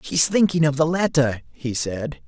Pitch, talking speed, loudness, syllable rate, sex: 150 Hz, 185 wpm, -21 LUFS, 4.4 syllables/s, male